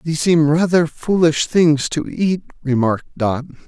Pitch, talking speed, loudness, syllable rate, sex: 155 Hz, 145 wpm, -17 LUFS, 4.6 syllables/s, male